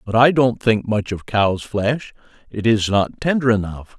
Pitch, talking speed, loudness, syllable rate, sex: 110 Hz, 195 wpm, -18 LUFS, 4.3 syllables/s, male